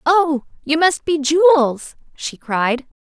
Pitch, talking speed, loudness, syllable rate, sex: 280 Hz, 140 wpm, -16 LUFS, 2.9 syllables/s, female